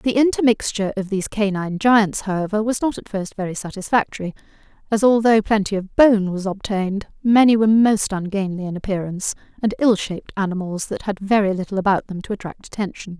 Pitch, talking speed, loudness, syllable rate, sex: 205 Hz, 175 wpm, -20 LUFS, 6.0 syllables/s, female